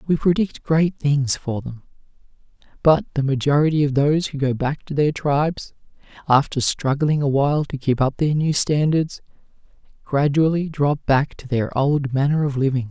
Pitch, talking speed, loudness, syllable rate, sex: 145 Hz, 165 wpm, -20 LUFS, 4.8 syllables/s, male